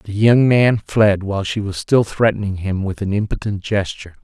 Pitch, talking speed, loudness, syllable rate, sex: 100 Hz, 200 wpm, -17 LUFS, 5.1 syllables/s, male